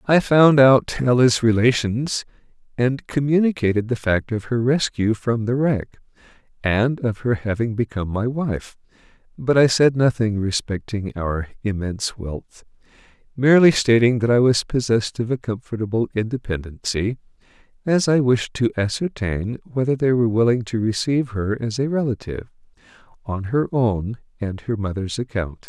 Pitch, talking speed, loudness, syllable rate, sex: 120 Hz, 145 wpm, -20 LUFS, 4.9 syllables/s, male